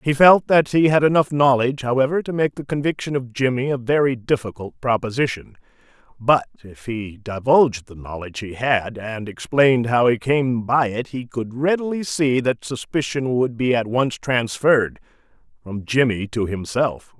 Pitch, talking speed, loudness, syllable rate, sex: 125 Hz, 170 wpm, -20 LUFS, 4.9 syllables/s, male